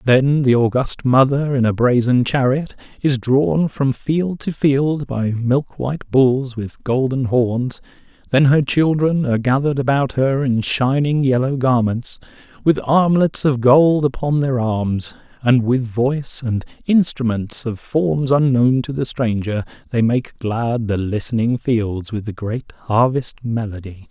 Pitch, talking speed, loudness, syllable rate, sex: 130 Hz, 150 wpm, -18 LUFS, 4.0 syllables/s, male